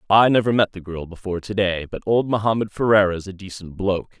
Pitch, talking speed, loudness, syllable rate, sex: 100 Hz, 200 wpm, -20 LUFS, 6.1 syllables/s, male